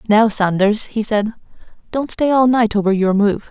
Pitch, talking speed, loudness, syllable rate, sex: 215 Hz, 190 wpm, -16 LUFS, 4.7 syllables/s, female